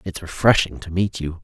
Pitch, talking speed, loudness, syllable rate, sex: 90 Hz, 210 wpm, -20 LUFS, 5.3 syllables/s, male